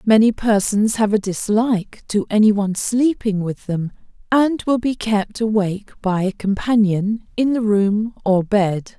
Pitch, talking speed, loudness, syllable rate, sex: 210 Hz, 160 wpm, -18 LUFS, 4.3 syllables/s, female